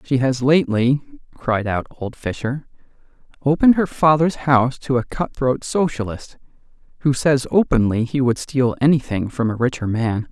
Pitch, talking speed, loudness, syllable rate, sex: 130 Hz, 155 wpm, -19 LUFS, 4.8 syllables/s, male